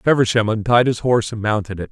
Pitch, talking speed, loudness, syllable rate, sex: 110 Hz, 220 wpm, -18 LUFS, 6.4 syllables/s, male